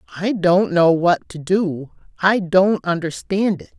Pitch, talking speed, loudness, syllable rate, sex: 180 Hz, 160 wpm, -18 LUFS, 3.9 syllables/s, female